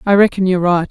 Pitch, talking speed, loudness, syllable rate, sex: 190 Hz, 265 wpm, -14 LUFS, 7.6 syllables/s, female